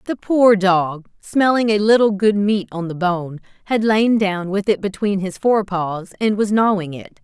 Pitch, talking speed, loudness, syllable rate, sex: 200 Hz, 200 wpm, -18 LUFS, 4.3 syllables/s, female